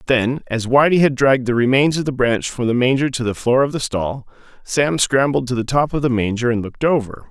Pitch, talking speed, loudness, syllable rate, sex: 130 Hz, 245 wpm, -17 LUFS, 5.6 syllables/s, male